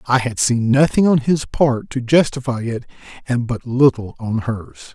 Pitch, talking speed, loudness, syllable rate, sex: 125 Hz, 180 wpm, -18 LUFS, 4.3 syllables/s, male